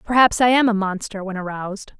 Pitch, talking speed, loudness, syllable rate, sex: 210 Hz, 210 wpm, -19 LUFS, 6.0 syllables/s, female